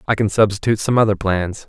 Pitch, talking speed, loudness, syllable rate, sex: 105 Hz, 215 wpm, -17 LUFS, 6.6 syllables/s, male